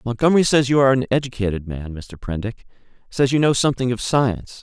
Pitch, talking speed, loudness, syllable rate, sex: 120 Hz, 195 wpm, -19 LUFS, 6.6 syllables/s, male